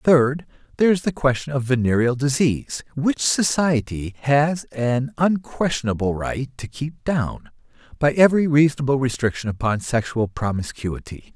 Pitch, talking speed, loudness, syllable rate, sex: 135 Hz, 125 wpm, -21 LUFS, 4.7 syllables/s, male